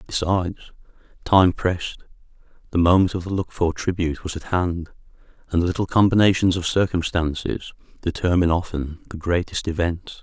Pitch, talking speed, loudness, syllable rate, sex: 90 Hz, 135 wpm, -22 LUFS, 5.7 syllables/s, male